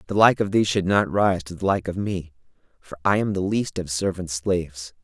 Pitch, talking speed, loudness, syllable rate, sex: 95 Hz, 240 wpm, -23 LUFS, 5.2 syllables/s, male